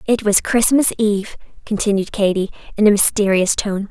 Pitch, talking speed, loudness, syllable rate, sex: 210 Hz, 155 wpm, -16 LUFS, 5.5 syllables/s, female